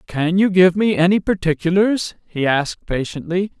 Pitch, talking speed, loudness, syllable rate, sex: 180 Hz, 150 wpm, -18 LUFS, 4.9 syllables/s, male